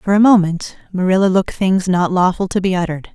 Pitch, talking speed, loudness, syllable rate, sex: 185 Hz, 210 wpm, -16 LUFS, 6.1 syllables/s, female